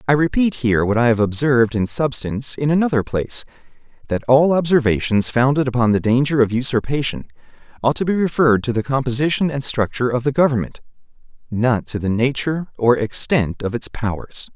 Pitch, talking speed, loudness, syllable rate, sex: 130 Hz, 175 wpm, -18 LUFS, 5.9 syllables/s, male